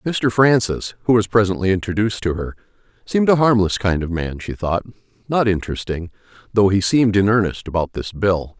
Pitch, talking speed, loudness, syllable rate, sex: 100 Hz, 180 wpm, -19 LUFS, 5.7 syllables/s, male